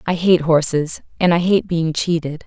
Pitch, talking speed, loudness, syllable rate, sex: 165 Hz, 195 wpm, -17 LUFS, 4.6 syllables/s, female